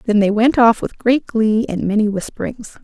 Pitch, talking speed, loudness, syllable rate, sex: 220 Hz, 210 wpm, -16 LUFS, 5.0 syllables/s, female